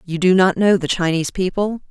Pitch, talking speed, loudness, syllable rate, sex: 185 Hz, 220 wpm, -17 LUFS, 5.8 syllables/s, female